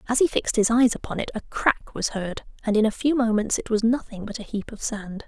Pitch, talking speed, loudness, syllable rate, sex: 225 Hz, 275 wpm, -24 LUFS, 5.8 syllables/s, female